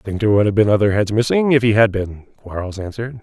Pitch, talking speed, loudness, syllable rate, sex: 105 Hz, 280 wpm, -17 LUFS, 6.8 syllables/s, male